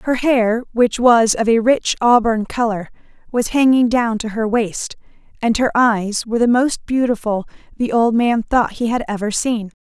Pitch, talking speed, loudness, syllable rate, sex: 230 Hz, 185 wpm, -17 LUFS, 4.4 syllables/s, female